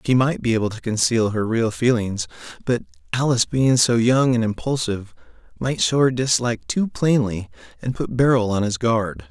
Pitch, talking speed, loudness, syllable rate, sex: 120 Hz, 180 wpm, -20 LUFS, 5.2 syllables/s, male